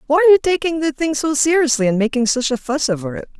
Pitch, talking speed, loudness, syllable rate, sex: 280 Hz, 265 wpm, -17 LUFS, 6.8 syllables/s, female